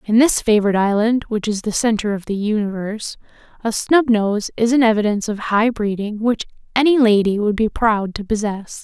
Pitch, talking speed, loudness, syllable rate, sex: 215 Hz, 185 wpm, -18 LUFS, 5.5 syllables/s, female